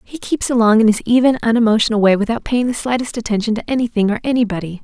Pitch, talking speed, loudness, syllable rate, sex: 225 Hz, 200 wpm, -16 LUFS, 6.7 syllables/s, female